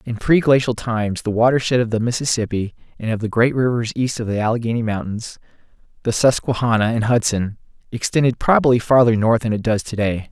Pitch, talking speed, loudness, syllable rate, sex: 115 Hz, 180 wpm, -18 LUFS, 5.9 syllables/s, male